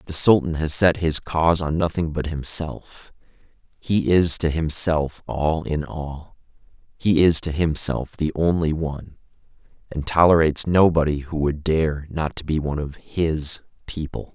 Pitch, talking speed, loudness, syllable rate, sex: 80 Hz, 155 wpm, -21 LUFS, 4.4 syllables/s, male